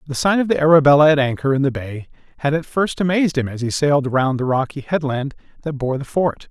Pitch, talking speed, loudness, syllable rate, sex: 145 Hz, 240 wpm, -18 LUFS, 6.2 syllables/s, male